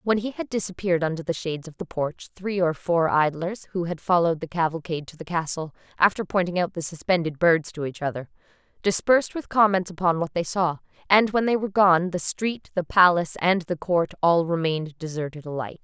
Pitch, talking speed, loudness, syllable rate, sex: 175 Hz, 205 wpm, -24 LUFS, 5.9 syllables/s, female